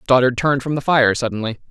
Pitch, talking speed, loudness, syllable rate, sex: 125 Hz, 210 wpm, -17 LUFS, 6.7 syllables/s, male